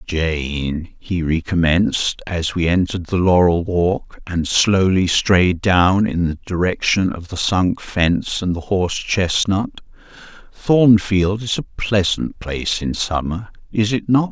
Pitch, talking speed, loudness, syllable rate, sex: 90 Hz, 145 wpm, -18 LUFS, 3.8 syllables/s, male